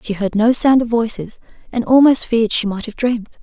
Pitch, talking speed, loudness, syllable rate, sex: 230 Hz, 230 wpm, -16 LUFS, 5.6 syllables/s, female